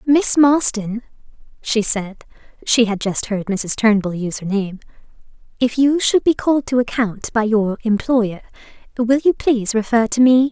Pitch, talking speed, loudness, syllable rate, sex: 230 Hz, 155 wpm, -17 LUFS, 4.7 syllables/s, female